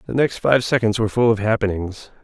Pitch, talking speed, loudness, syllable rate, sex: 110 Hz, 215 wpm, -19 LUFS, 6.1 syllables/s, male